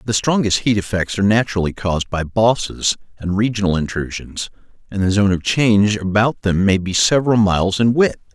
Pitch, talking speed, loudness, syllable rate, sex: 100 Hz, 180 wpm, -17 LUFS, 5.7 syllables/s, male